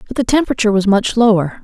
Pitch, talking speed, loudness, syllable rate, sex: 220 Hz, 220 wpm, -14 LUFS, 7.5 syllables/s, female